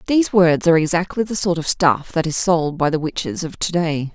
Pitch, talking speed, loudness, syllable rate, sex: 170 Hz, 245 wpm, -18 LUFS, 5.5 syllables/s, female